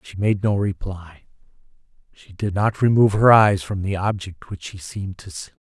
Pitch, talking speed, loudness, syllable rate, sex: 95 Hz, 190 wpm, -20 LUFS, 5.1 syllables/s, male